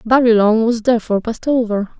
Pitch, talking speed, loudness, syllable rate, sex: 225 Hz, 150 wpm, -15 LUFS, 6.6 syllables/s, female